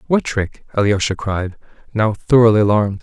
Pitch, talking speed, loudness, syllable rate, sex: 110 Hz, 140 wpm, -17 LUFS, 5.5 syllables/s, male